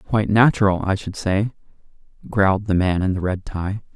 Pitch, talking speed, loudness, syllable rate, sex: 100 Hz, 180 wpm, -20 LUFS, 5.4 syllables/s, male